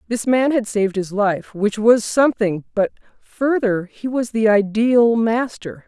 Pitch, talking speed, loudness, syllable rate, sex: 220 Hz, 165 wpm, -18 LUFS, 4.2 syllables/s, female